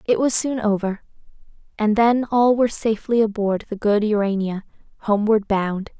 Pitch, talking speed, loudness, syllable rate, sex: 215 Hz, 150 wpm, -20 LUFS, 5.3 syllables/s, female